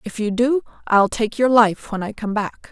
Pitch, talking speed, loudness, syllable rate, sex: 225 Hz, 245 wpm, -19 LUFS, 4.7 syllables/s, female